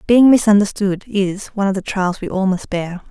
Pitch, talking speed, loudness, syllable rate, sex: 200 Hz, 210 wpm, -17 LUFS, 5.2 syllables/s, female